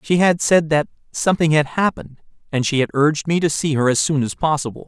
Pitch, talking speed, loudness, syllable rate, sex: 155 Hz, 235 wpm, -18 LUFS, 6.2 syllables/s, male